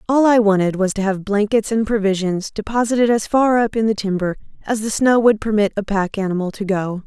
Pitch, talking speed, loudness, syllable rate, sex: 210 Hz, 220 wpm, -18 LUFS, 5.7 syllables/s, female